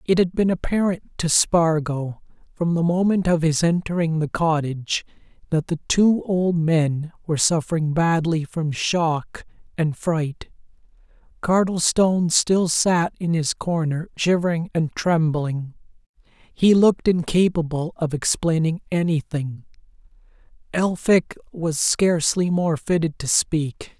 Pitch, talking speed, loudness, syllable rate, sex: 165 Hz, 120 wpm, -21 LUFS, 4.1 syllables/s, male